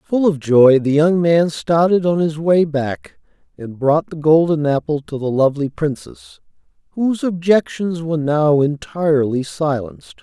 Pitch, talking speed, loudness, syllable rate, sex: 155 Hz, 155 wpm, -17 LUFS, 4.5 syllables/s, male